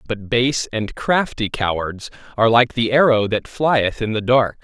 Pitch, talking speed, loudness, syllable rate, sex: 115 Hz, 180 wpm, -18 LUFS, 4.3 syllables/s, male